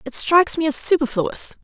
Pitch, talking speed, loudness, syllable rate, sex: 290 Hz, 185 wpm, -18 LUFS, 5.5 syllables/s, female